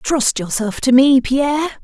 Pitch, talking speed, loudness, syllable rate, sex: 265 Hz, 165 wpm, -15 LUFS, 4.2 syllables/s, female